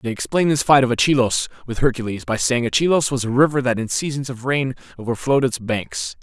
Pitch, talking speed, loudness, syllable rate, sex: 125 Hz, 210 wpm, -19 LUFS, 5.9 syllables/s, male